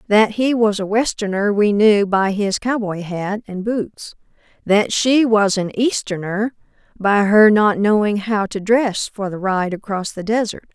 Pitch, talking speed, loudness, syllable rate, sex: 210 Hz, 175 wpm, -17 LUFS, 4.1 syllables/s, female